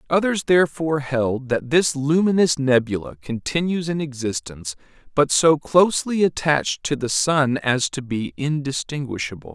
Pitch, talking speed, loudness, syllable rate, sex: 145 Hz, 130 wpm, -21 LUFS, 4.8 syllables/s, male